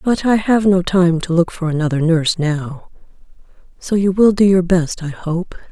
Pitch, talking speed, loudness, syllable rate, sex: 175 Hz, 200 wpm, -16 LUFS, 4.8 syllables/s, female